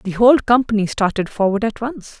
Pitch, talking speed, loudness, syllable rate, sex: 220 Hz, 190 wpm, -17 LUFS, 5.6 syllables/s, female